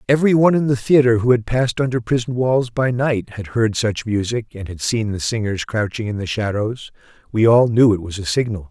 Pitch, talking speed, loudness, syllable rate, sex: 115 Hz, 225 wpm, -18 LUFS, 5.6 syllables/s, male